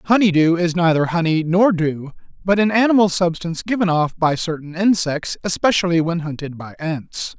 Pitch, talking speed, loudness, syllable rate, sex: 170 Hz, 160 wpm, -18 LUFS, 5.2 syllables/s, male